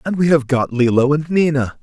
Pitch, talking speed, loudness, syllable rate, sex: 145 Hz, 230 wpm, -16 LUFS, 5.2 syllables/s, male